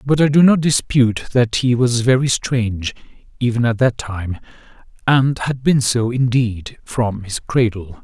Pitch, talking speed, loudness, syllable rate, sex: 120 Hz, 165 wpm, -17 LUFS, 4.3 syllables/s, male